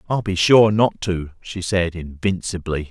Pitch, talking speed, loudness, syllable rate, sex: 95 Hz, 165 wpm, -19 LUFS, 4.2 syllables/s, male